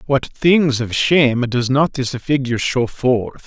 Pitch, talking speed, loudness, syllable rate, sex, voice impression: 130 Hz, 175 wpm, -17 LUFS, 4.0 syllables/s, male, very masculine, very middle-aged, thick, slightly tensed, slightly powerful, slightly bright, soft, slightly muffled, fluent, raspy, cool, intellectual, slightly refreshing, sincere, slightly calm, mature, friendly, reassuring, very unique, very elegant, slightly wild, slightly sweet, lively, slightly strict, slightly modest